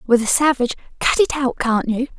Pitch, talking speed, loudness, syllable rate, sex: 265 Hz, 220 wpm, -18 LUFS, 6.0 syllables/s, female